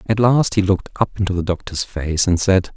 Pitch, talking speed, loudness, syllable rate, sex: 95 Hz, 240 wpm, -18 LUFS, 5.5 syllables/s, male